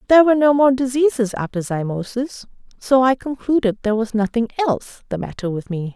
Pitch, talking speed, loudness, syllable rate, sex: 240 Hz, 180 wpm, -19 LUFS, 6.0 syllables/s, female